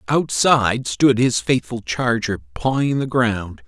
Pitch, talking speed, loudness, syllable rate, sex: 120 Hz, 130 wpm, -19 LUFS, 3.9 syllables/s, male